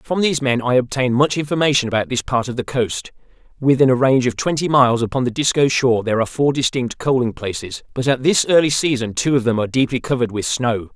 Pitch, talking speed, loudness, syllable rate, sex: 130 Hz, 230 wpm, -18 LUFS, 6.6 syllables/s, male